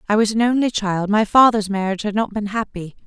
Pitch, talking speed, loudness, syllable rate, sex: 210 Hz, 235 wpm, -18 LUFS, 6.1 syllables/s, female